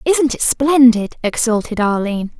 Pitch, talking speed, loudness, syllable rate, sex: 240 Hz, 125 wpm, -15 LUFS, 4.6 syllables/s, female